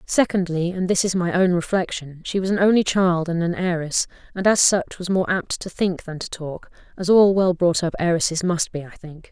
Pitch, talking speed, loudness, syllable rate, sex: 180 Hz, 220 wpm, -21 LUFS, 5.1 syllables/s, female